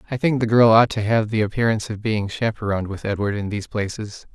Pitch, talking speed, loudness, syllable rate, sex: 110 Hz, 235 wpm, -20 LUFS, 6.4 syllables/s, male